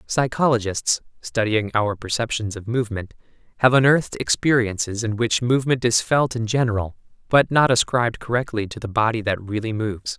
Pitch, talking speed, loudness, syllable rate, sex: 115 Hz, 155 wpm, -21 LUFS, 5.6 syllables/s, male